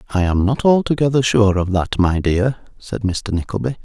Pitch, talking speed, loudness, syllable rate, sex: 110 Hz, 190 wpm, -17 LUFS, 5.1 syllables/s, male